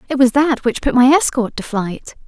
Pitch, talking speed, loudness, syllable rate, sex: 250 Hz, 235 wpm, -15 LUFS, 5.0 syllables/s, female